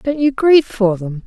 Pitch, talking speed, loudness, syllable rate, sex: 240 Hz, 235 wpm, -15 LUFS, 4.9 syllables/s, female